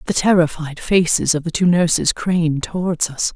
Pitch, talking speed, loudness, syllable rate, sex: 165 Hz, 180 wpm, -17 LUFS, 5.0 syllables/s, female